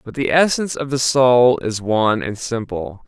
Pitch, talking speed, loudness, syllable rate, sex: 120 Hz, 195 wpm, -17 LUFS, 4.7 syllables/s, male